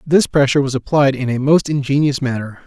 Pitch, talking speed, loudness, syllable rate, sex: 135 Hz, 200 wpm, -16 LUFS, 5.9 syllables/s, male